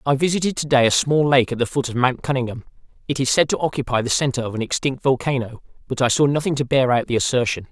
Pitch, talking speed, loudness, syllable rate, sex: 130 Hz, 255 wpm, -20 LUFS, 6.7 syllables/s, male